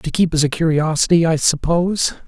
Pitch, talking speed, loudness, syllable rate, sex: 160 Hz, 185 wpm, -17 LUFS, 5.6 syllables/s, male